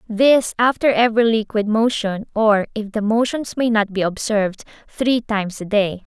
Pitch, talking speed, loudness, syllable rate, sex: 220 Hz, 165 wpm, -18 LUFS, 4.8 syllables/s, female